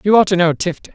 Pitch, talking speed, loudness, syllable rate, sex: 185 Hz, 315 wpm, -15 LUFS, 7.1 syllables/s, female